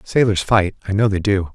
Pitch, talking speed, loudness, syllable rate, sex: 100 Hz, 235 wpm, -18 LUFS, 5.4 syllables/s, male